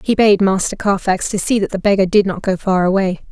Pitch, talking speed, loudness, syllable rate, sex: 195 Hz, 255 wpm, -16 LUFS, 5.7 syllables/s, female